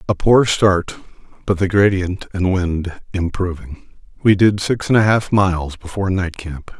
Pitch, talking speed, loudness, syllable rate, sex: 95 Hz, 170 wpm, -17 LUFS, 4.4 syllables/s, male